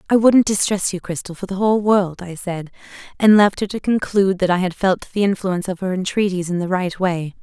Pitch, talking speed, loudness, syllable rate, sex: 190 Hz, 225 wpm, -18 LUFS, 5.7 syllables/s, female